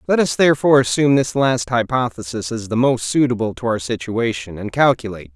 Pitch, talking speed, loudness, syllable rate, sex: 120 Hz, 180 wpm, -18 LUFS, 6.0 syllables/s, male